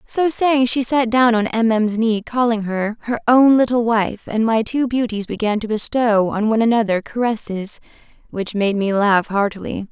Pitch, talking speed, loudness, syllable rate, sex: 225 Hz, 190 wpm, -18 LUFS, 4.9 syllables/s, female